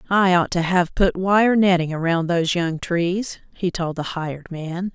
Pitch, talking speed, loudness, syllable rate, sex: 175 Hz, 195 wpm, -20 LUFS, 4.4 syllables/s, female